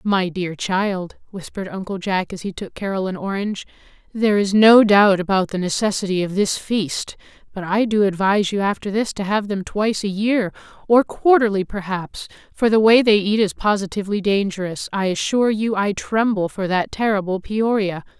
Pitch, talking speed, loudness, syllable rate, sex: 200 Hz, 180 wpm, -19 LUFS, 5.2 syllables/s, female